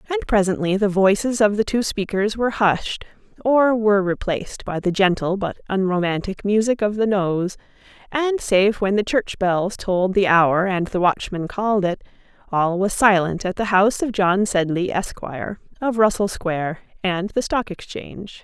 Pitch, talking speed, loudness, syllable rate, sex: 200 Hz, 170 wpm, -20 LUFS, 4.8 syllables/s, female